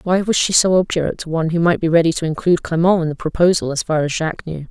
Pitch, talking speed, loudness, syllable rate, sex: 165 Hz, 280 wpm, -17 LUFS, 7.2 syllables/s, female